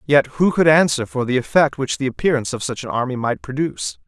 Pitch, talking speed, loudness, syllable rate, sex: 130 Hz, 235 wpm, -19 LUFS, 6.2 syllables/s, male